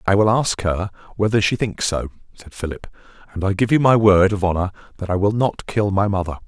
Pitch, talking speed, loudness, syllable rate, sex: 100 Hz, 230 wpm, -19 LUFS, 5.8 syllables/s, male